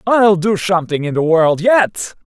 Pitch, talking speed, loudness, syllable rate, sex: 185 Hz, 180 wpm, -14 LUFS, 4.4 syllables/s, male